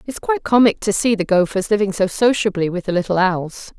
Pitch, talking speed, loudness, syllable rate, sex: 200 Hz, 220 wpm, -18 LUFS, 5.8 syllables/s, female